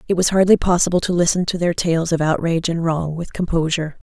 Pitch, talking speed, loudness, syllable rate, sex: 170 Hz, 220 wpm, -18 LUFS, 6.3 syllables/s, female